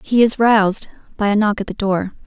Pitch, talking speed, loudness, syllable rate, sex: 210 Hz, 240 wpm, -17 LUFS, 5.6 syllables/s, female